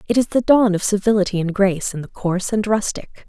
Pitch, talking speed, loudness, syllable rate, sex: 200 Hz, 240 wpm, -18 LUFS, 6.2 syllables/s, female